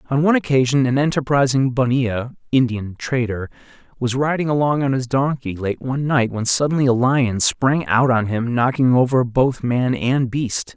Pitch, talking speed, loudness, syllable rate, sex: 130 Hz, 175 wpm, -19 LUFS, 5.7 syllables/s, male